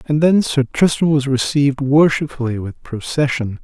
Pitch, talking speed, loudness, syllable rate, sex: 140 Hz, 150 wpm, -16 LUFS, 4.9 syllables/s, male